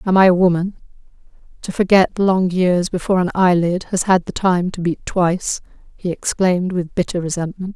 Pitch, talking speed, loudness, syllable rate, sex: 180 Hz, 180 wpm, -18 LUFS, 5.3 syllables/s, female